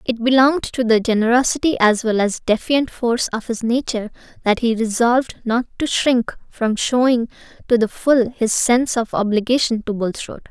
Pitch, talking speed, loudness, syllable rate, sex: 235 Hz, 170 wpm, -18 LUFS, 5.3 syllables/s, female